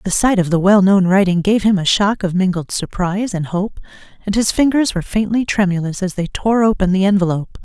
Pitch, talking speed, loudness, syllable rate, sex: 195 Hz, 210 wpm, -16 LUFS, 5.8 syllables/s, female